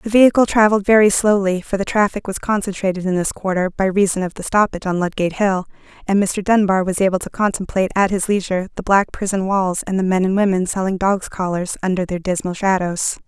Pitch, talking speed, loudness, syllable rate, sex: 190 Hz, 210 wpm, -18 LUFS, 6.2 syllables/s, female